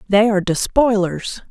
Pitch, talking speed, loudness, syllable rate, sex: 205 Hz, 120 wpm, -17 LUFS, 4.7 syllables/s, female